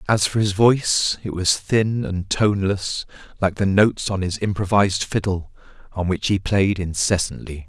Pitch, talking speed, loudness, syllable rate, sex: 100 Hz, 165 wpm, -20 LUFS, 4.8 syllables/s, male